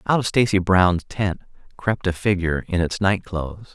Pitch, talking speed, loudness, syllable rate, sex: 95 Hz, 190 wpm, -21 LUFS, 4.9 syllables/s, male